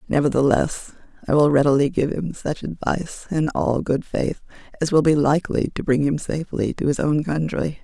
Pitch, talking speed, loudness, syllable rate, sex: 150 Hz, 185 wpm, -21 LUFS, 5.3 syllables/s, female